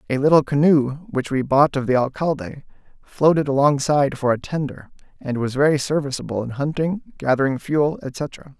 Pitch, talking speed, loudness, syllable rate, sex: 140 Hz, 160 wpm, -20 LUFS, 5.1 syllables/s, male